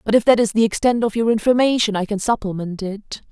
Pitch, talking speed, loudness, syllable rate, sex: 215 Hz, 235 wpm, -18 LUFS, 6.1 syllables/s, female